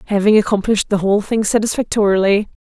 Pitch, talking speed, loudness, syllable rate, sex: 205 Hz, 135 wpm, -16 LUFS, 7.0 syllables/s, female